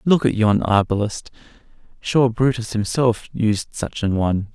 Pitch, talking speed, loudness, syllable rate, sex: 110 Hz, 145 wpm, -20 LUFS, 4.4 syllables/s, male